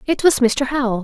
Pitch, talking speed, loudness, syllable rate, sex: 260 Hz, 235 wpm, -17 LUFS, 5.5 syllables/s, female